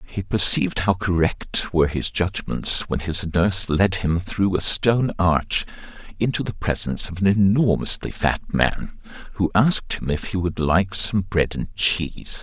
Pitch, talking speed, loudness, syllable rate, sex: 95 Hz, 170 wpm, -21 LUFS, 4.4 syllables/s, male